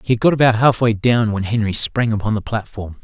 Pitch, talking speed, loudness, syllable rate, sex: 110 Hz, 235 wpm, -17 LUFS, 5.9 syllables/s, male